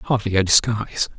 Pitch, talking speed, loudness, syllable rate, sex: 105 Hz, 150 wpm, -19 LUFS, 5.6 syllables/s, male